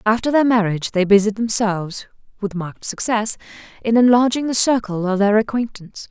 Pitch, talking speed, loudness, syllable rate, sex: 215 Hz, 155 wpm, -18 LUFS, 5.7 syllables/s, female